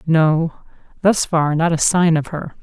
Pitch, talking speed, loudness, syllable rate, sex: 160 Hz, 185 wpm, -17 LUFS, 4.1 syllables/s, female